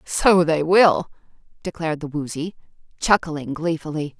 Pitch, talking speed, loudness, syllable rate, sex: 160 Hz, 115 wpm, -20 LUFS, 4.5 syllables/s, female